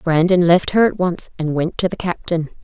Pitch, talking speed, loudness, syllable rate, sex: 175 Hz, 230 wpm, -18 LUFS, 5.0 syllables/s, female